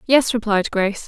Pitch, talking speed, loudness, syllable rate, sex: 220 Hz, 170 wpm, -19 LUFS, 5.5 syllables/s, female